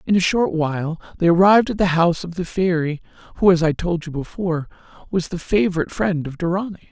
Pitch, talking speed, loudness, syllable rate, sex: 175 Hz, 210 wpm, -20 LUFS, 6.3 syllables/s, female